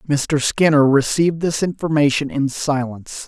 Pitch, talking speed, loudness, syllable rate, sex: 145 Hz, 130 wpm, -18 LUFS, 4.9 syllables/s, male